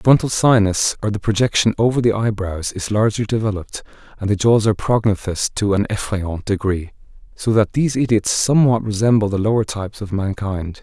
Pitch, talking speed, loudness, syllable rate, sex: 105 Hz, 185 wpm, -18 LUFS, 5.8 syllables/s, male